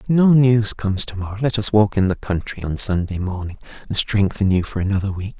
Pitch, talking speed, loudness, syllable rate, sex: 100 Hz, 235 wpm, -19 LUFS, 5.8 syllables/s, male